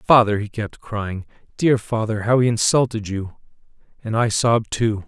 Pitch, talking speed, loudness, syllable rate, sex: 110 Hz, 165 wpm, -20 LUFS, 4.6 syllables/s, male